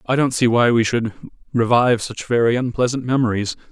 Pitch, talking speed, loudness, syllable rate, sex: 120 Hz, 175 wpm, -18 LUFS, 5.8 syllables/s, male